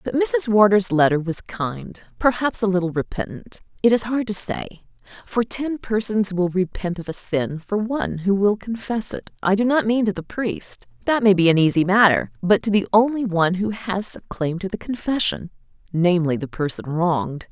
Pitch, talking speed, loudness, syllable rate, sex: 200 Hz, 190 wpm, -21 LUFS, 5.0 syllables/s, female